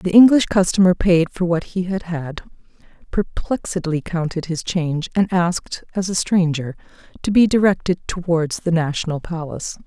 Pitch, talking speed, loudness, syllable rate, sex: 175 Hz, 150 wpm, -19 LUFS, 5.0 syllables/s, female